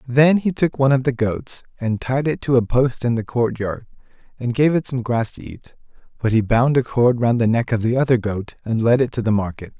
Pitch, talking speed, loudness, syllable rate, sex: 120 Hz, 250 wpm, -19 LUFS, 5.4 syllables/s, male